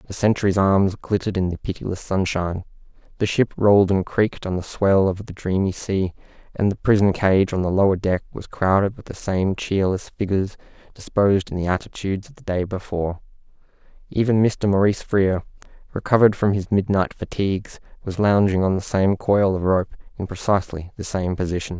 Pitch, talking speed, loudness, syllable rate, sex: 95 Hz, 180 wpm, -21 LUFS, 5.7 syllables/s, male